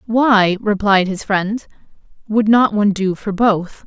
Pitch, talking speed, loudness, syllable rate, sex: 205 Hz, 155 wpm, -16 LUFS, 3.9 syllables/s, female